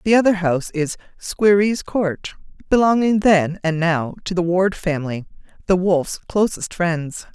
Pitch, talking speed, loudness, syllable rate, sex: 180 Hz, 145 wpm, -19 LUFS, 4.7 syllables/s, female